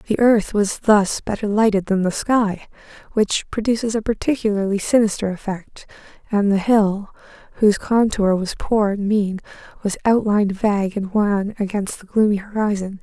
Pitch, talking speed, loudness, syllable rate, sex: 205 Hz, 150 wpm, -19 LUFS, 4.9 syllables/s, female